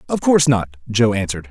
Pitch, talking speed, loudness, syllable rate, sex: 120 Hz, 200 wpm, -17 LUFS, 6.5 syllables/s, male